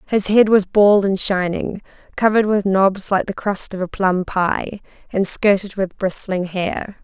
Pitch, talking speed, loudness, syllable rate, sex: 195 Hz, 180 wpm, -18 LUFS, 4.2 syllables/s, female